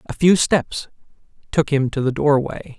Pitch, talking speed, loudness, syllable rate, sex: 145 Hz, 170 wpm, -19 LUFS, 4.4 syllables/s, male